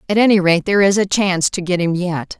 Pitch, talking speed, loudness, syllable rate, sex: 185 Hz, 275 wpm, -16 LUFS, 6.3 syllables/s, female